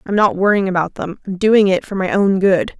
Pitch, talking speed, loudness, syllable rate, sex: 195 Hz, 260 wpm, -16 LUFS, 5.4 syllables/s, female